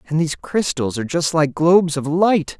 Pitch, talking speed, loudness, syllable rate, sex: 160 Hz, 210 wpm, -18 LUFS, 5.4 syllables/s, male